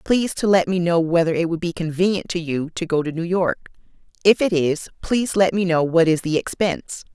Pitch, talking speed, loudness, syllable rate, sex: 175 Hz, 235 wpm, -20 LUFS, 5.7 syllables/s, female